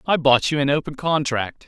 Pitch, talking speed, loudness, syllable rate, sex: 145 Hz, 215 wpm, -20 LUFS, 5.2 syllables/s, male